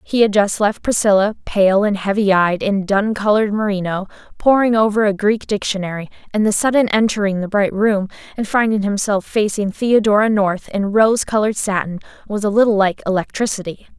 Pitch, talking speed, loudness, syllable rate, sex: 205 Hz, 170 wpm, -17 LUFS, 5.4 syllables/s, female